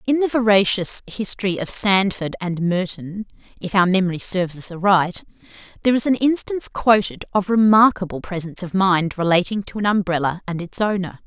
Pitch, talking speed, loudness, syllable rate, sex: 195 Hz, 165 wpm, -19 LUFS, 5.5 syllables/s, female